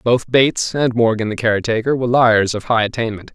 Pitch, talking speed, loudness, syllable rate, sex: 115 Hz, 195 wpm, -16 LUFS, 5.9 syllables/s, male